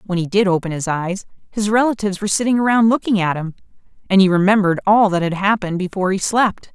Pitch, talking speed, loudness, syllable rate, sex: 195 Hz, 215 wpm, -17 LUFS, 6.7 syllables/s, female